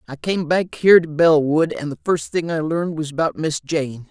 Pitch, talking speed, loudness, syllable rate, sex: 155 Hz, 235 wpm, -19 LUFS, 5.2 syllables/s, male